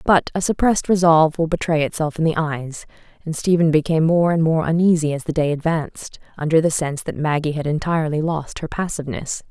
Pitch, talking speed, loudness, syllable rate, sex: 160 Hz, 195 wpm, -19 LUFS, 6.1 syllables/s, female